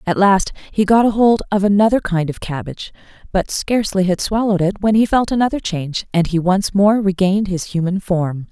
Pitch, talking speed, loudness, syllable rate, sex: 195 Hz, 195 wpm, -17 LUFS, 5.4 syllables/s, female